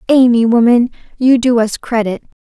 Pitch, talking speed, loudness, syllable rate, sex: 235 Hz, 150 wpm, -13 LUFS, 5.0 syllables/s, female